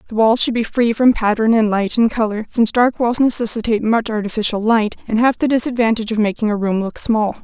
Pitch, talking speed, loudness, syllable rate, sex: 225 Hz, 225 wpm, -16 LUFS, 6.1 syllables/s, female